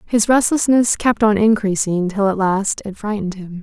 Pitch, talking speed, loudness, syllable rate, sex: 205 Hz, 180 wpm, -17 LUFS, 4.9 syllables/s, female